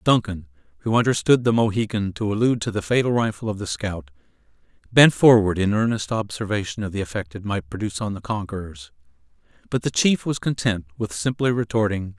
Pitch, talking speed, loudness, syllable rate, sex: 105 Hz, 175 wpm, -22 LUFS, 5.9 syllables/s, male